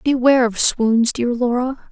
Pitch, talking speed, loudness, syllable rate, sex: 245 Hz, 155 wpm, -17 LUFS, 4.4 syllables/s, female